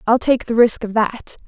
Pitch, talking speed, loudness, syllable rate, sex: 225 Hz, 245 wpm, -17 LUFS, 4.8 syllables/s, female